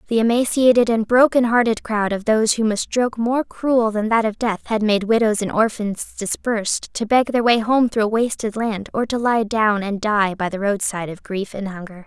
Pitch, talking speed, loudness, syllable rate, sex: 220 Hz, 220 wpm, -19 LUFS, 5.1 syllables/s, female